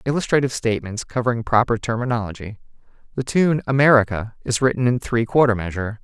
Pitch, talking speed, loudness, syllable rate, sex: 120 Hz, 140 wpm, -20 LUFS, 6.5 syllables/s, male